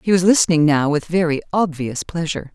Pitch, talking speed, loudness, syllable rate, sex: 165 Hz, 190 wpm, -18 LUFS, 6.0 syllables/s, female